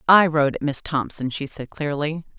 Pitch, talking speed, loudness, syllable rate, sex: 145 Hz, 200 wpm, -22 LUFS, 5.2 syllables/s, female